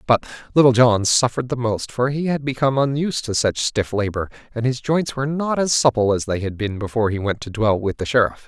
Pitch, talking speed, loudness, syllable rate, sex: 120 Hz, 240 wpm, -20 LUFS, 6.0 syllables/s, male